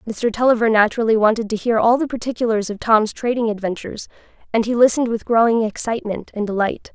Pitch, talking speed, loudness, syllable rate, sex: 225 Hz, 180 wpm, -18 LUFS, 6.5 syllables/s, female